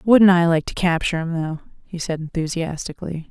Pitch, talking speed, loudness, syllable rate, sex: 170 Hz, 180 wpm, -20 LUFS, 5.5 syllables/s, female